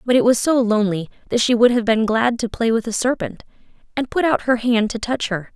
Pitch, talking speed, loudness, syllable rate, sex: 230 Hz, 260 wpm, -19 LUFS, 5.7 syllables/s, female